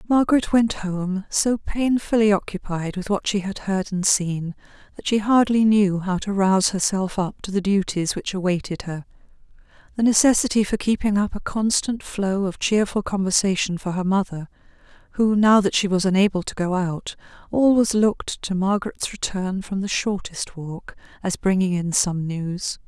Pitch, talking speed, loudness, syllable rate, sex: 195 Hz, 170 wpm, -21 LUFS, 4.8 syllables/s, female